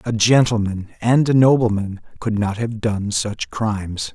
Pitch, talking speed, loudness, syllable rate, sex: 110 Hz, 160 wpm, -19 LUFS, 4.3 syllables/s, male